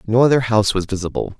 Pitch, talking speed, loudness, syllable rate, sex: 110 Hz, 215 wpm, -17 LUFS, 7.3 syllables/s, male